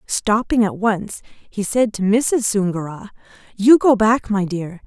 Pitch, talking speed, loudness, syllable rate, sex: 210 Hz, 160 wpm, -18 LUFS, 3.9 syllables/s, female